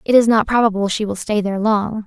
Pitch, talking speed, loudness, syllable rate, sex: 210 Hz, 260 wpm, -17 LUFS, 6.1 syllables/s, female